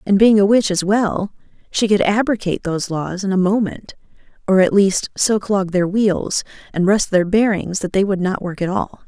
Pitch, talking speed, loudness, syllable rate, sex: 195 Hz, 210 wpm, -17 LUFS, 4.9 syllables/s, female